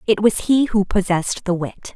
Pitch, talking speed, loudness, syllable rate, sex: 200 Hz, 215 wpm, -19 LUFS, 5.0 syllables/s, female